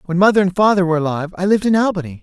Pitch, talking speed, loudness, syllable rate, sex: 185 Hz, 270 wpm, -16 LUFS, 8.7 syllables/s, male